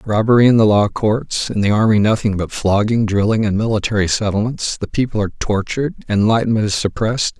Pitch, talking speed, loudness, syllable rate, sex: 110 Hz, 180 wpm, -16 LUFS, 5.9 syllables/s, male